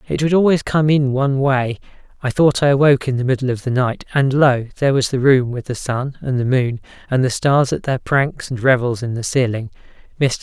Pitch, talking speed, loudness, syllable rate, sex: 130 Hz, 230 wpm, -17 LUFS, 5.5 syllables/s, male